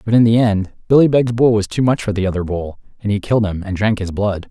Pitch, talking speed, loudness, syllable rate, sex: 105 Hz, 295 wpm, -16 LUFS, 6.2 syllables/s, male